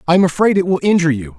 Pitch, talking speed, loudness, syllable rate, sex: 165 Hz, 305 wpm, -15 LUFS, 8.1 syllables/s, male